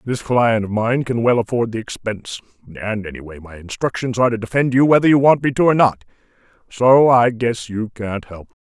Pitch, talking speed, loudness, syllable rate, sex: 115 Hz, 215 wpm, -17 LUFS, 5.9 syllables/s, male